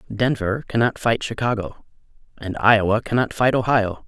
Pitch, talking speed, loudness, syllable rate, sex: 110 Hz, 130 wpm, -20 LUFS, 5.3 syllables/s, male